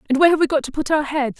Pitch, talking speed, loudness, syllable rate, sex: 290 Hz, 390 wpm, -18 LUFS, 8.3 syllables/s, female